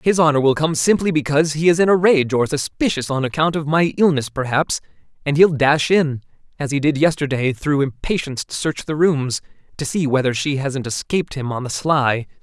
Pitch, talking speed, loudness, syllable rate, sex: 145 Hz, 210 wpm, -18 LUFS, 5.4 syllables/s, male